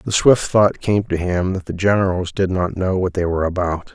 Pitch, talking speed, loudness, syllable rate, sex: 95 Hz, 245 wpm, -18 LUFS, 5.2 syllables/s, male